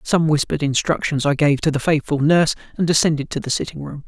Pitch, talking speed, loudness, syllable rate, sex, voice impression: 150 Hz, 220 wpm, -19 LUFS, 6.4 syllables/s, male, masculine, adult-like, slightly middle-aged, slightly thick, slightly relaxed, slightly weak, slightly soft, clear, fluent, cool, intellectual, very refreshing, sincere, calm, slightly mature, friendly, reassuring, slightly unique, elegant, slightly wild, sweet, lively, kind, slightly intense